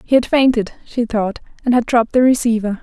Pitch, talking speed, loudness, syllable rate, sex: 235 Hz, 210 wpm, -16 LUFS, 5.8 syllables/s, female